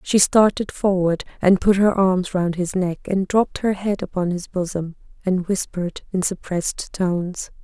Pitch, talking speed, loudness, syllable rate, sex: 185 Hz, 175 wpm, -21 LUFS, 4.9 syllables/s, female